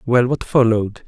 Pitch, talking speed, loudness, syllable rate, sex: 120 Hz, 170 wpm, -17 LUFS, 5.3 syllables/s, male